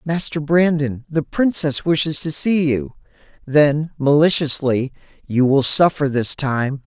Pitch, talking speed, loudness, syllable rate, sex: 145 Hz, 130 wpm, -18 LUFS, 3.9 syllables/s, male